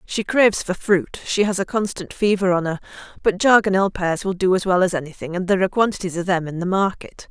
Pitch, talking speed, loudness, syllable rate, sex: 190 Hz, 230 wpm, -20 LUFS, 6.3 syllables/s, female